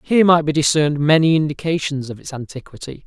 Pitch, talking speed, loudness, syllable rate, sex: 150 Hz, 175 wpm, -16 LUFS, 6.4 syllables/s, male